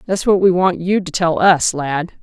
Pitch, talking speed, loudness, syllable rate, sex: 180 Hz, 245 wpm, -15 LUFS, 4.6 syllables/s, female